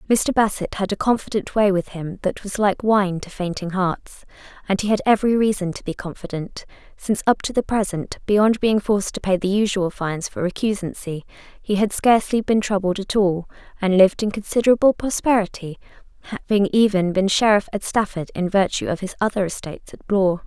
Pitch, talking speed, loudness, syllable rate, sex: 200 Hz, 190 wpm, -20 LUFS, 5.6 syllables/s, female